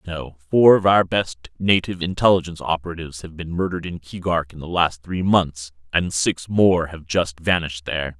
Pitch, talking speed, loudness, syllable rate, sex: 85 Hz, 190 wpm, -20 LUFS, 5.5 syllables/s, male